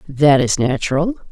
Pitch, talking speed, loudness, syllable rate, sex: 150 Hz, 135 wpm, -16 LUFS, 4.8 syllables/s, female